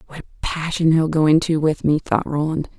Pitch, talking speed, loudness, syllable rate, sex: 155 Hz, 215 wpm, -19 LUFS, 5.5 syllables/s, female